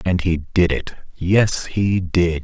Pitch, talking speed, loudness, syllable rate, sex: 90 Hz, 175 wpm, -19 LUFS, 3.4 syllables/s, male